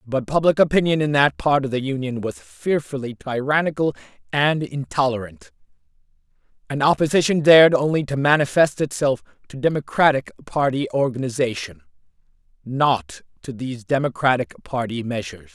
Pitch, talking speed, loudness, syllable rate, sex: 140 Hz, 115 wpm, -20 LUFS, 5.3 syllables/s, male